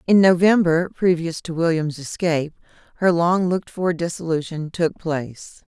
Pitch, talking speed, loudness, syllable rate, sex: 170 Hz, 135 wpm, -20 LUFS, 4.8 syllables/s, female